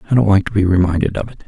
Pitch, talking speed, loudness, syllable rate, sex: 100 Hz, 325 wpm, -15 LUFS, 8.1 syllables/s, male